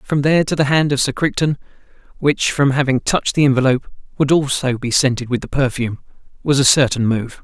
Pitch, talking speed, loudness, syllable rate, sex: 135 Hz, 185 wpm, -17 LUFS, 6.1 syllables/s, male